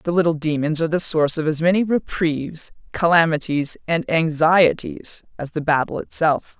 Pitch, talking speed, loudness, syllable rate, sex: 160 Hz, 155 wpm, -19 LUFS, 5.1 syllables/s, female